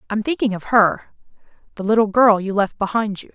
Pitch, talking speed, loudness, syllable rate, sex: 210 Hz, 180 wpm, -18 LUFS, 5.9 syllables/s, female